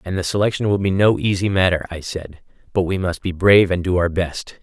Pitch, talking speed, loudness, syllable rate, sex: 90 Hz, 245 wpm, -19 LUFS, 5.7 syllables/s, male